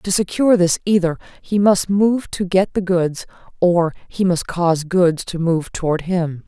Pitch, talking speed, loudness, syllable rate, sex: 180 Hz, 185 wpm, -18 LUFS, 4.4 syllables/s, female